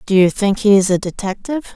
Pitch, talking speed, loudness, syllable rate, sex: 200 Hz, 240 wpm, -16 LUFS, 6.1 syllables/s, female